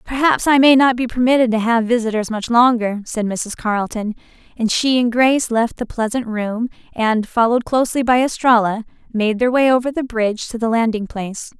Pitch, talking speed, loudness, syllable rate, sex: 235 Hz, 190 wpm, -17 LUFS, 5.5 syllables/s, female